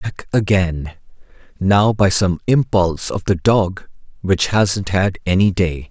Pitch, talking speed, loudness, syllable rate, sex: 95 Hz, 140 wpm, -17 LUFS, 3.8 syllables/s, male